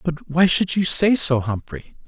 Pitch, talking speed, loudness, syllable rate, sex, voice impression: 160 Hz, 200 wpm, -18 LUFS, 4.2 syllables/s, male, masculine, adult-like, slightly fluent, slightly refreshing, sincere, friendly, reassuring, slightly elegant, slightly sweet